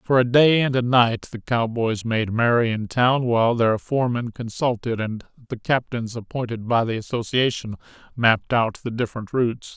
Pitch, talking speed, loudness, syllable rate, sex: 120 Hz, 170 wpm, -21 LUFS, 5.0 syllables/s, male